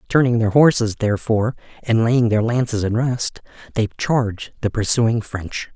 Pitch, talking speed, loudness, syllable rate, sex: 115 Hz, 155 wpm, -19 LUFS, 4.9 syllables/s, male